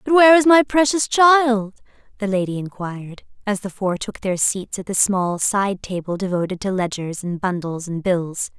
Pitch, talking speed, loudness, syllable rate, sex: 205 Hz, 190 wpm, -19 LUFS, 4.8 syllables/s, female